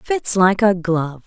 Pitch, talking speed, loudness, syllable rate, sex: 190 Hz, 190 wpm, -17 LUFS, 4.1 syllables/s, female